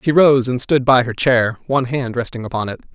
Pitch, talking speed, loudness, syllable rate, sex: 125 Hz, 245 wpm, -17 LUFS, 5.8 syllables/s, male